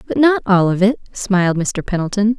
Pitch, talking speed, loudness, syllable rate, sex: 205 Hz, 200 wpm, -16 LUFS, 5.3 syllables/s, female